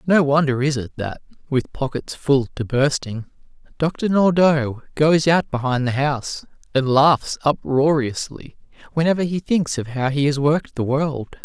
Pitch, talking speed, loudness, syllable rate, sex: 140 Hz, 155 wpm, -20 LUFS, 4.5 syllables/s, male